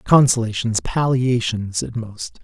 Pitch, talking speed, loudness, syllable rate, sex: 120 Hz, 100 wpm, -20 LUFS, 3.9 syllables/s, male